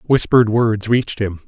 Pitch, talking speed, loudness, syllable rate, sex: 110 Hz, 165 wpm, -16 LUFS, 5.0 syllables/s, male